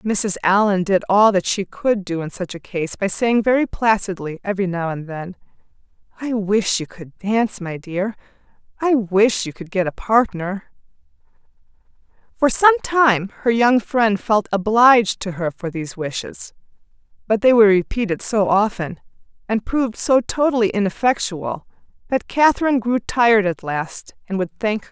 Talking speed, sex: 165 wpm, female